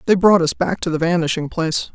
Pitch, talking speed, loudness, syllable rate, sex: 170 Hz, 245 wpm, -18 LUFS, 6.2 syllables/s, female